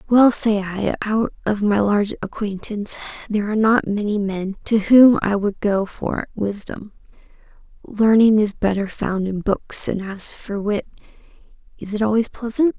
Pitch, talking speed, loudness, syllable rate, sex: 210 Hz, 160 wpm, -19 LUFS, 4.6 syllables/s, female